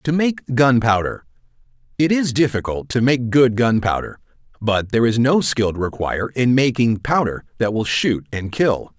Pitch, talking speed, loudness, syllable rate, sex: 120 Hz, 155 wpm, -18 LUFS, 4.6 syllables/s, male